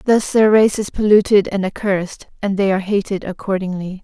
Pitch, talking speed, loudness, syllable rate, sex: 200 Hz, 180 wpm, -17 LUFS, 5.6 syllables/s, female